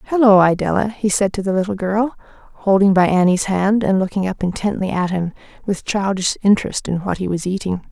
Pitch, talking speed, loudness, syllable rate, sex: 195 Hz, 195 wpm, -18 LUFS, 5.6 syllables/s, female